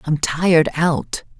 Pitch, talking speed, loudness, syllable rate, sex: 160 Hz, 130 wpm, -17 LUFS, 3.6 syllables/s, female